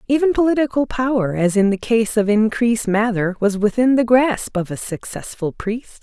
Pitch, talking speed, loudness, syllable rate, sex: 225 Hz, 160 wpm, -18 LUFS, 5.0 syllables/s, female